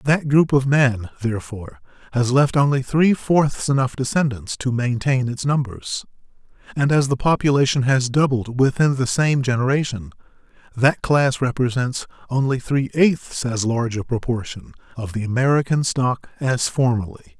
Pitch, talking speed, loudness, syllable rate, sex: 130 Hz, 145 wpm, -20 LUFS, 4.8 syllables/s, male